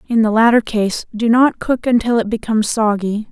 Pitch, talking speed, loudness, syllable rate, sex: 225 Hz, 200 wpm, -15 LUFS, 5.2 syllables/s, female